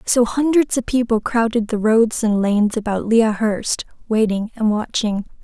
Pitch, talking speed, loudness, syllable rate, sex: 225 Hz, 165 wpm, -18 LUFS, 4.5 syllables/s, female